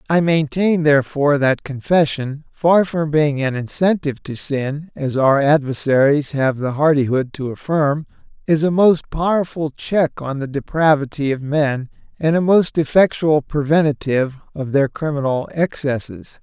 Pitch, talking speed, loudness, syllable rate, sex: 150 Hz, 140 wpm, -18 LUFS, 4.5 syllables/s, male